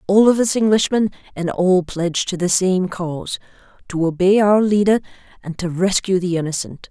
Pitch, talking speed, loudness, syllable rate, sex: 185 Hz, 165 wpm, -18 LUFS, 5.2 syllables/s, female